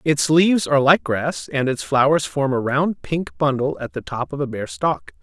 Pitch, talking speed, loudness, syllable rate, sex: 135 Hz, 230 wpm, -20 LUFS, 4.7 syllables/s, male